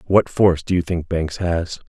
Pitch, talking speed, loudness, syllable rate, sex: 85 Hz, 220 wpm, -20 LUFS, 4.9 syllables/s, male